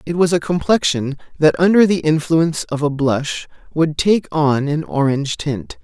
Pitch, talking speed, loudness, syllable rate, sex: 155 Hz, 175 wpm, -17 LUFS, 4.6 syllables/s, male